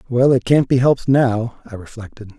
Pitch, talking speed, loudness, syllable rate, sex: 120 Hz, 200 wpm, -16 LUFS, 5.3 syllables/s, male